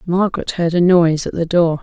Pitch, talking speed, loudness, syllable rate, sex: 170 Hz, 230 wpm, -16 LUFS, 5.9 syllables/s, female